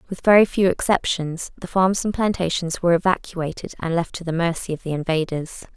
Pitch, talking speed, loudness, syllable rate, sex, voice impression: 175 Hz, 190 wpm, -21 LUFS, 5.6 syllables/s, female, very feminine, young, very thin, tensed, powerful, bright, hard, very clear, very fluent, slightly raspy, very cute, intellectual, very refreshing, sincere, very calm, very friendly, very reassuring, very unique, very elegant, slightly wild, very sweet, lively, kind, slightly sharp